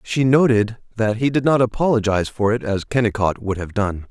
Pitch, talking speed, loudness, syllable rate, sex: 115 Hz, 205 wpm, -19 LUFS, 5.5 syllables/s, male